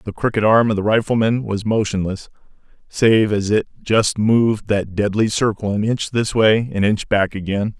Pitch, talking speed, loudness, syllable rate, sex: 105 Hz, 185 wpm, -18 LUFS, 4.7 syllables/s, male